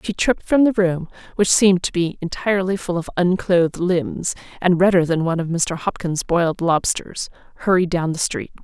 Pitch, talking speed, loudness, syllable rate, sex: 175 Hz, 190 wpm, -19 LUFS, 5.4 syllables/s, female